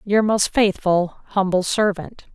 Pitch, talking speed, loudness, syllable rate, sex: 195 Hz, 130 wpm, -19 LUFS, 4.0 syllables/s, female